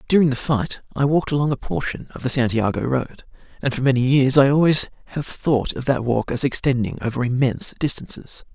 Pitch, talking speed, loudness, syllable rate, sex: 130 Hz, 195 wpm, -20 LUFS, 5.7 syllables/s, male